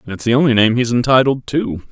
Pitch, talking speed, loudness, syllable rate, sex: 125 Hz, 250 wpm, -15 LUFS, 6.4 syllables/s, male